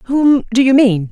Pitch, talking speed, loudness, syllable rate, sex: 240 Hz, 215 wpm, -12 LUFS, 4.1 syllables/s, female